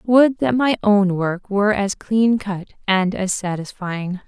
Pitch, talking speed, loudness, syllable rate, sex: 205 Hz, 170 wpm, -19 LUFS, 3.8 syllables/s, female